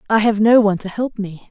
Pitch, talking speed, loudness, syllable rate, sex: 210 Hz, 280 wpm, -16 LUFS, 6.1 syllables/s, female